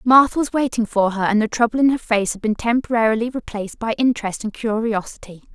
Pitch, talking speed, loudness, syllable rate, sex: 225 Hz, 205 wpm, -19 LUFS, 6.2 syllables/s, female